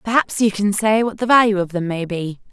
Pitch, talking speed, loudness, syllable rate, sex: 205 Hz, 260 wpm, -18 LUFS, 5.6 syllables/s, female